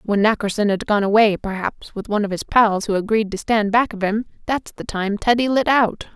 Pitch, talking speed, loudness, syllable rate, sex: 210 Hz, 235 wpm, -19 LUFS, 5.4 syllables/s, female